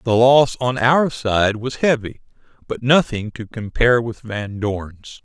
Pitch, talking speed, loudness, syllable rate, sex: 115 Hz, 160 wpm, -18 LUFS, 3.9 syllables/s, male